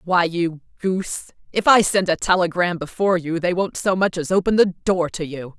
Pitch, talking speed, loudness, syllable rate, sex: 180 Hz, 215 wpm, -20 LUFS, 5.2 syllables/s, female